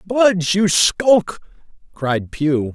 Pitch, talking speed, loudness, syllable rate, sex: 175 Hz, 110 wpm, -17 LUFS, 2.9 syllables/s, male